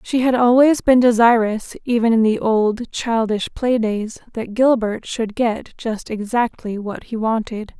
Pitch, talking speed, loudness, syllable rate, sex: 230 Hz, 160 wpm, -18 LUFS, 4.1 syllables/s, female